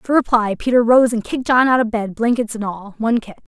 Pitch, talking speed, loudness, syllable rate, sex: 230 Hz, 255 wpm, -17 LUFS, 6.1 syllables/s, female